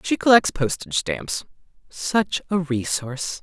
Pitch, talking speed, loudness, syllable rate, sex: 145 Hz, 120 wpm, -22 LUFS, 4.3 syllables/s, male